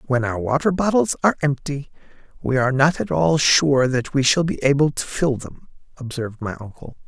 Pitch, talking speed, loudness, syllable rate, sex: 140 Hz, 195 wpm, -20 LUFS, 5.4 syllables/s, male